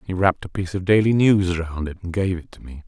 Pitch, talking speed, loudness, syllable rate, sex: 90 Hz, 290 wpm, -21 LUFS, 6.3 syllables/s, male